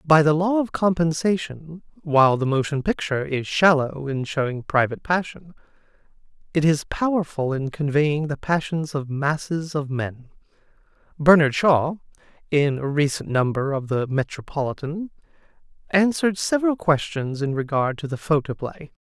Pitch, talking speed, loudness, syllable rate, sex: 150 Hz, 135 wpm, -22 LUFS, 4.8 syllables/s, male